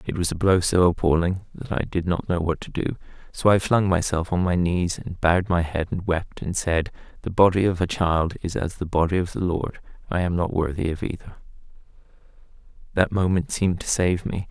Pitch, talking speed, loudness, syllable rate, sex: 90 Hz, 220 wpm, -23 LUFS, 5.5 syllables/s, male